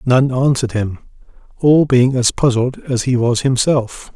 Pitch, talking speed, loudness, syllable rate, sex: 125 Hz, 160 wpm, -15 LUFS, 4.4 syllables/s, male